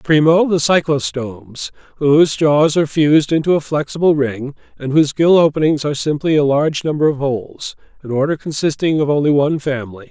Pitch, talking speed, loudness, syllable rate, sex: 150 Hz, 170 wpm, -15 LUFS, 5.8 syllables/s, male